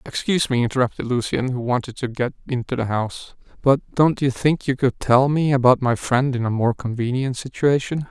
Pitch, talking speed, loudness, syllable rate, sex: 130 Hz, 200 wpm, -20 LUFS, 5.4 syllables/s, male